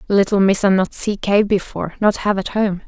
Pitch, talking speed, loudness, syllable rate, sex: 200 Hz, 210 wpm, -17 LUFS, 5.4 syllables/s, female